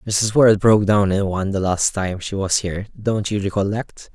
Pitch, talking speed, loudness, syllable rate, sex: 100 Hz, 205 wpm, -19 LUFS, 5.4 syllables/s, male